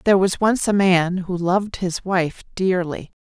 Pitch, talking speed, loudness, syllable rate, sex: 185 Hz, 185 wpm, -20 LUFS, 4.5 syllables/s, female